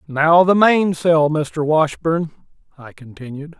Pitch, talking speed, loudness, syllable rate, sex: 155 Hz, 115 wpm, -16 LUFS, 3.8 syllables/s, male